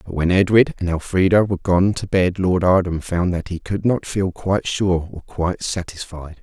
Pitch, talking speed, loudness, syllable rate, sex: 90 Hz, 205 wpm, -19 LUFS, 5.0 syllables/s, male